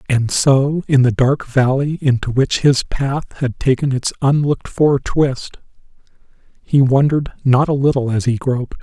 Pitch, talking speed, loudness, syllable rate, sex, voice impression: 135 Hz, 165 wpm, -16 LUFS, 4.5 syllables/s, male, masculine, middle-aged, relaxed, slightly weak, soft, raspy, calm, mature, wild, kind, modest